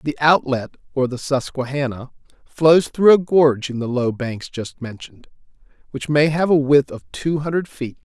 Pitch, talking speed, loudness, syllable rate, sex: 135 Hz, 175 wpm, -19 LUFS, 4.7 syllables/s, male